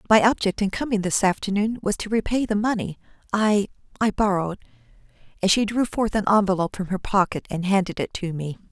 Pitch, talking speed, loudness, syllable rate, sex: 200 Hz, 185 wpm, -23 LUFS, 6.0 syllables/s, female